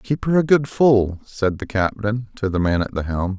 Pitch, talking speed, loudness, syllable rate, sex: 110 Hz, 250 wpm, -20 LUFS, 4.6 syllables/s, male